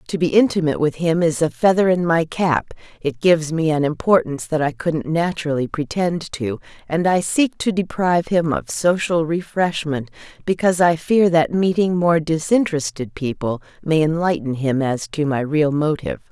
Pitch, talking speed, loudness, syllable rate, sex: 160 Hz, 175 wpm, -19 LUFS, 5.1 syllables/s, female